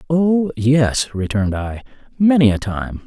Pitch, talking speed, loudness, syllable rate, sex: 125 Hz, 135 wpm, -17 LUFS, 4.1 syllables/s, male